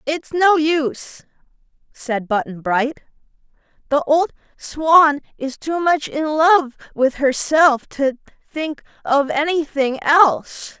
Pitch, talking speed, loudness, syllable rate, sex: 290 Hz, 115 wpm, -18 LUFS, 3.5 syllables/s, female